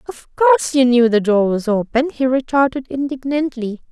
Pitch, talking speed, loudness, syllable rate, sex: 260 Hz, 170 wpm, -17 LUFS, 4.9 syllables/s, female